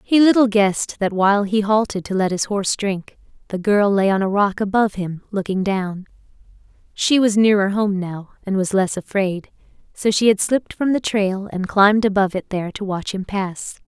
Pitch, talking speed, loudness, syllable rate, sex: 200 Hz, 205 wpm, -19 LUFS, 5.2 syllables/s, female